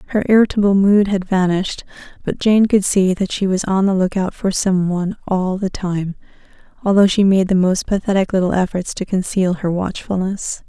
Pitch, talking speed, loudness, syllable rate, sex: 190 Hz, 185 wpm, -17 LUFS, 5.2 syllables/s, female